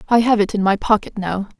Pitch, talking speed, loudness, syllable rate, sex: 210 Hz, 265 wpm, -18 LUFS, 6.0 syllables/s, female